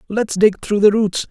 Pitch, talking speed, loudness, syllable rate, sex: 210 Hz, 230 wpm, -16 LUFS, 4.5 syllables/s, male